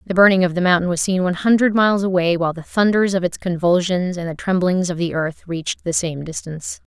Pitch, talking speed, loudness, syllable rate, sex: 180 Hz, 235 wpm, -18 LUFS, 6.2 syllables/s, female